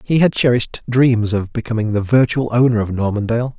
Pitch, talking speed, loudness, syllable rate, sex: 115 Hz, 185 wpm, -17 LUFS, 5.8 syllables/s, male